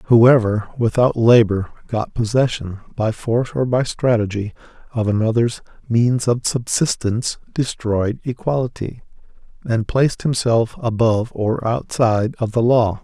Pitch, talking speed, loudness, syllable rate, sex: 115 Hz, 120 wpm, -19 LUFS, 4.5 syllables/s, male